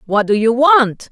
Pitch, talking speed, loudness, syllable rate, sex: 240 Hz, 215 wpm, -13 LUFS, 4.1 syllables/s, female